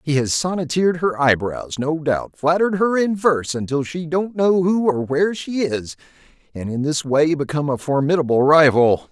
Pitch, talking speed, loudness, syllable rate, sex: 155 Hz, 180 wpm, -19 LUFS, 5.1 syllables/s, male